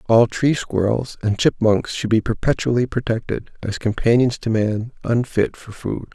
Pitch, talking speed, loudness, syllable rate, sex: 115 Hz, 155 wpm, -20 LUFS, 4.5 syllables/s, male